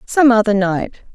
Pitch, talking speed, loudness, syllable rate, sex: 220 Hz, 155 wpm, -15 LUFS, 4.8 syllables/s, female